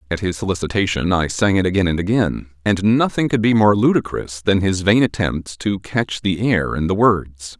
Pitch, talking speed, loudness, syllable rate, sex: 100 Hz, 205 wpm, -18 LUFS, 5.0 syllables/s, male